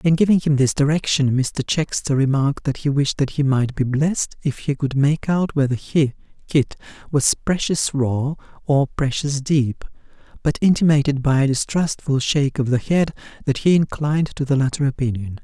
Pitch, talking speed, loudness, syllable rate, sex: 140 Hz, 180 wpm, -20 LUFS, 5.4 syllables/s, male